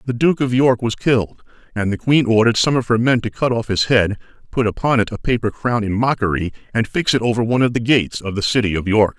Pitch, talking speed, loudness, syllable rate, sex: 115 Hz, 260 wpm, -18 LUFS, 6.2 syllables/s, male